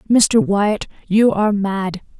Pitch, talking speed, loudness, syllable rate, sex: 200 Hz, 135 wpm, -17 LUFS, 3.6 syllables/s, female